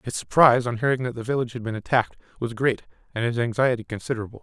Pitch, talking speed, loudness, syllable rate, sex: 120 Hz, 215 wpm, -23 LUFS, 7.7 syllables/s, male